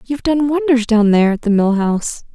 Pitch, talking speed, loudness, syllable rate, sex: 240 Hz, 230 wpm, -15 LUFS, 6.0 syllables/s, female